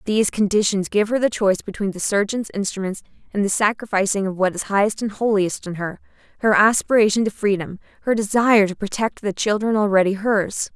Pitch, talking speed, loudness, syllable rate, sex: 205 Hz, 180 wpm, -20 LUFS, 5.9 syllables/s, female